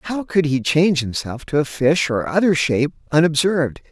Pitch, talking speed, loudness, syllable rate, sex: 155 Hz, 185 wpm, -18 LUFS, 5.5 syllables/s, male